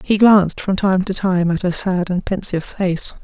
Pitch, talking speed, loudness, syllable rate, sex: 185 Hz, 225 wpm, -17 LUFS, 4.9 syllables/s, female